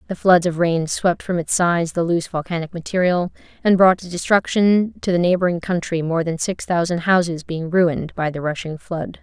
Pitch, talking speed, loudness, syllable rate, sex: 175 Hz, 195 wpm, -19 LUFS, 5.2 syllables/s, female